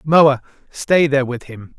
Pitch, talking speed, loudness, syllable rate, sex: 140 Hz, 170 wpm, -16 LUFS, 4.3 syllables/s, male